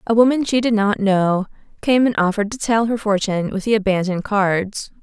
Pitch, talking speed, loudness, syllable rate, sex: 210 Hz, 205 wpm, -18 LUFS, 5.6 syllables/s, female